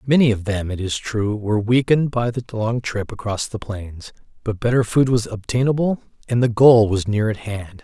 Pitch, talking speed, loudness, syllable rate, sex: 110 Hz, 205 wpm, -20 LUFS, 5.1 syllables/s, male